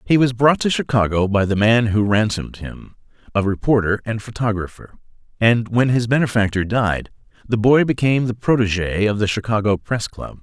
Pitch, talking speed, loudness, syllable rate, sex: 110 Hz, 175 wpm, -18 LUFS, 5.2 syllables/s, male